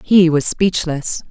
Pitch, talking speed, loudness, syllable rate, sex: 170 Hz, 140 wpm, -16 LUFS, 3.5 syllables/s, female